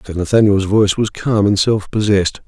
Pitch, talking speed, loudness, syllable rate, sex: 100 Hz, 195 wpm, -15 LUFS, 5.7 syllables/s, male